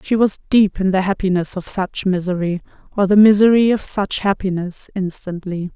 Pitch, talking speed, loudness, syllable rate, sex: 190 Hz, 165 wpm, -17 LUFS, 5.0 syllables/s, female